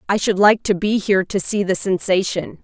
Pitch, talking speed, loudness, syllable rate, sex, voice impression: 195 Hz, 230 wpm, -18 LUFS, 5.3 syllables/s, female, very feminine, adult-like, slightly calm, slightly reassuring, elegant